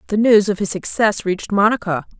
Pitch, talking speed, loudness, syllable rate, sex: 200 Hz, 190 wpm, -17 LUFS, 5.8 syllables/s, female